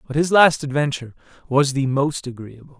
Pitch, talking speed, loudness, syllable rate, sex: 140 Hz, 170 wpm, -19 LUFS, 5.7 syllables/s, male